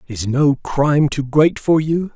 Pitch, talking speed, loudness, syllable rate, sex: 145 Hz, 195 wpm, -17 LUFS, 4.0 syllables/s, male